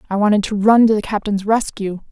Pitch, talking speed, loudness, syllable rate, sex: 210 Hz, 225 wpm, -16 LUFS, 5.8 syllables/s, female